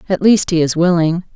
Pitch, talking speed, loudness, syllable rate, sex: 175 Hz, 220 wpm, -14 LUFS, 5.5 syllables/s, female